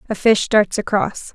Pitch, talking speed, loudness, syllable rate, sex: 210 Hz, 180 wpm, -17 LUFS, 4.3 syllables/s, female